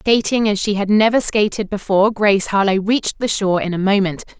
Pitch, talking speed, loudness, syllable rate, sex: 205 Hz, 205 wpm, -17 LUFS, 6.2 syllables/s, female